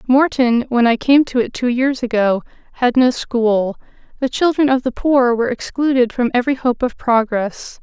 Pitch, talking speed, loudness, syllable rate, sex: 250 Hz, 185 wpm, -16 LUFS, 4.8 syllables/s, female